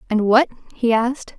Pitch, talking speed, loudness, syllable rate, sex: 240 Hz, 175 wpm, -18 LUFS, 5.5 syllables/s, female